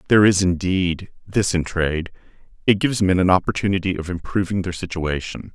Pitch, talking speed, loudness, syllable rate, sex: 90 Hz, 150 wpm, -20 LUFS, 5.8 syllables/s, male